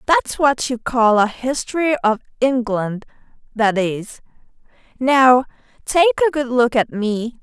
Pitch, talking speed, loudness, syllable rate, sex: 245 Hz, 135 wpm, -17 LUFS, 3.8 syllables/s, female